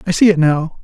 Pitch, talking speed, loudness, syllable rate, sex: 165 Hz, 285 wpm, -13 LUFS, 5.9 syllables/s, male